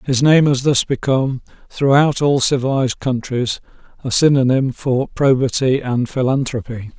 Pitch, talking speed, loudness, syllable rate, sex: 130 Hz, 130 wpm, -16 LUFS, 4.9 syllables/s, male